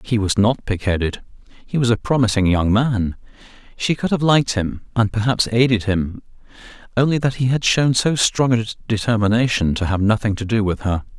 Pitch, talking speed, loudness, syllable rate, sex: 110 Hz, 180 wpm, -19 LUFS, 5.2 syllables/s, male